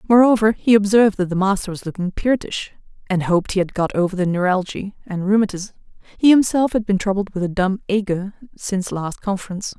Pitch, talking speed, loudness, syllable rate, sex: 200 Hz, 190 wpm, -19 LUFS, 6.1 syllables/s, female